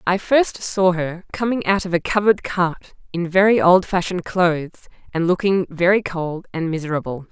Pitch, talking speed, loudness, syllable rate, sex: 180 Hz, 165 wpm, -19 LUFS, 5.0 syllables/s, female